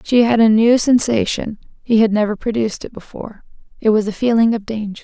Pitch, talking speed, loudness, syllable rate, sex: 220 Hz, 205 wpm, -16 LUFS, 6.0 syllables/s, female